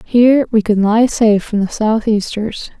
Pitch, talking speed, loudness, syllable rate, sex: 220 Hz, 195 wpm, -14 LUFS, 4.7 syllables/s, female